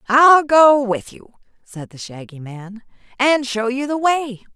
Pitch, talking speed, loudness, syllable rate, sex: 245 Hz, 170 wpm, -15 LUFS, 3.8 syllables/s, female